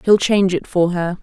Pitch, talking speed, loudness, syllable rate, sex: 185 Hz, 245 wpm, -17 LUFS, 5.4 syllables/s, female